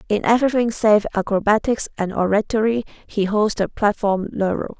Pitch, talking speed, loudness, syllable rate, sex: 210 Hz, 140 wpm, -19 LUFS, 5.1 syllables/s, female